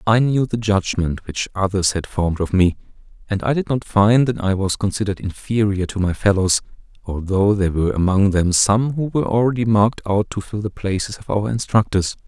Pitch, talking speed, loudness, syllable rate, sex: 105 Hz, 200 wpm, -19 LUFS, 5.6 syllables/s, male